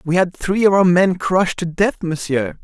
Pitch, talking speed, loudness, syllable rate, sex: 175 Hz, 225 wpm, -17 LUFS, 4.8 syllables/s, male